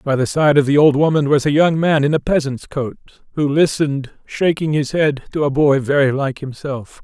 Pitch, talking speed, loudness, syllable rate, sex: 145 Hz, 220 wpm, -16 LUFS, 5.2 syllables/s, male